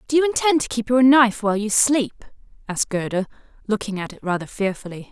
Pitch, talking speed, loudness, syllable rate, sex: 225 Hz, 200 wpm, -20 LUFS, 6.2 syllables/s, female